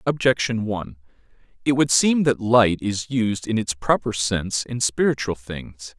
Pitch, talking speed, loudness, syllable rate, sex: 110 Hz, 160 wpm, -21 LUFS, 4.5 syllables/s, male